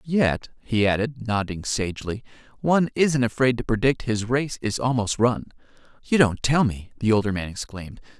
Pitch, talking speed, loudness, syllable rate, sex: 115 Hz, 170 wpm, -23 LUFS, 5.1 syllables/s, male